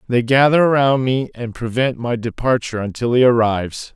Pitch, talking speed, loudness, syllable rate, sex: 120 Hz, 165 wpm, -17 LUFS, 5.4 syllables/s, male